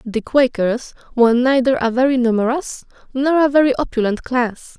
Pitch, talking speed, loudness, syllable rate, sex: 250 Hz, 150 wpm, -17 LUFS, 5.1 syllables/s, female